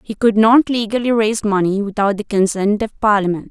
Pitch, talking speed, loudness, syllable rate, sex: 210 Hz, 190 wpm, -16 LUFS, 5.6 syllables/s, female